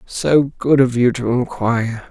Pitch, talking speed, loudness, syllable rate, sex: 125 Hz, 170 wpm, -17 LUFS, 4.0 syllables/s, male